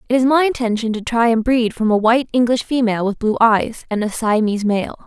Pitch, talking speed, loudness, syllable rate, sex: 230 Hz, 235 wpm, -17 LUFS, 5.9 syllables/s, female